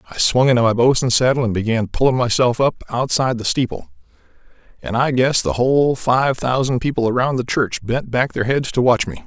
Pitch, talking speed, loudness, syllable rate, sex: 120 Hz, 205 wpm, -17 LUFS, 5.6 syllables/s, male